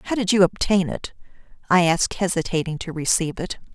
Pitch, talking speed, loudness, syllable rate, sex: 180 Hz, 175 wpm, -21 LUFS, 5.9 syllables/s, female